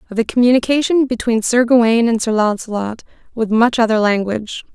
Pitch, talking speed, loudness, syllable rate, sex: 230 Hz, 165 wpm, -15 LUFS, 6.0 syllables/s, female